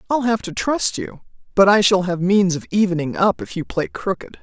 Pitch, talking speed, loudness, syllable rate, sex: 195 Hz, 230 wpm, -19 LUFS, 5.2 syllables/s, female